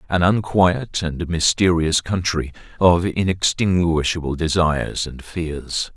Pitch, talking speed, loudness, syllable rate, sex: 85 Hz, 100 wpm, -19 LUFS, 3.8 syllables/s, male